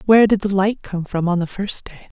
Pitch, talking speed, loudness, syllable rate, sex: 190 Hz, 275 wpm, -19 LUFS, 6.2 syllables/s, female